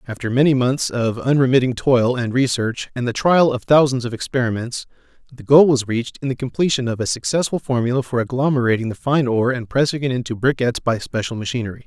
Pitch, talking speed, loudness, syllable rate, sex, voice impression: 125 Hz, 195 wpm, -19 LUFS, 6.2 syllables/s, male, very masculine, young, adult-like, thick, slightly tensed, slightly weak, bright, hard, clear, fluent, slightly raspy, cool, very intellectual, refreshing, sincere, calm, mature, friendly, very reassuring, unique, elegant, very wild, sweet, kind, slightly modest